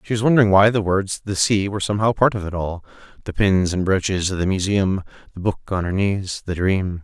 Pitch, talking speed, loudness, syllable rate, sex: 95 Hz, 230 wpm, -20 LUFS, 5.8 syllables/s, male